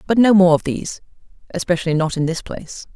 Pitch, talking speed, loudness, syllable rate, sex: 180 Hz, 205 wpm, -17 LUFS, 6.6 syllables/s, female